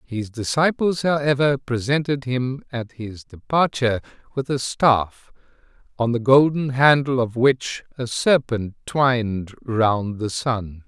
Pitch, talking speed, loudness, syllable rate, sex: 125 Hz, 125 wpm, -21 LUFS, 3.8 syllables/s, male